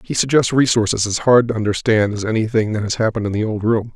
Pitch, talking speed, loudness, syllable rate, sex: 110 Hz, 245 wpm, -17 LUFS, 6.5 syllables/s, male